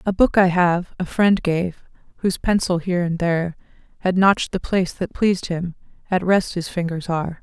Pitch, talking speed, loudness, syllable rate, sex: 180 Hz, 195 wpm, -20 LUFS, 5.5 syllables/s, female